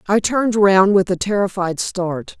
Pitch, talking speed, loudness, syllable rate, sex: 195 Hz, 175 wpm, -17 LUFS, 4.4 syllables/s, female